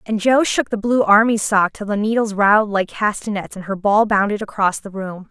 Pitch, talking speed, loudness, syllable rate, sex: 210 Hz, 225 wpm, -17 LUFS, 5.2 syllables/s, female